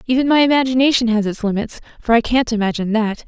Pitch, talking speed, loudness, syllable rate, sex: 235 Hz, 200 wpm, -16 LUFS, 6.8 syllables/s, female